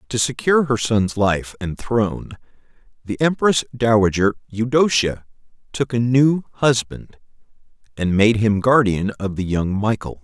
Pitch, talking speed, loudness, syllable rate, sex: 115 Hz, 135 wpm, -19 LUFS, 4.4 syllables/s, male